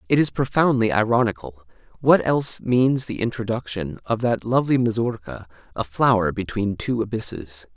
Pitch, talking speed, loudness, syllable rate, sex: 110 Hz, 130 wpm, -21 LUFS, 5.2 syllables/s, male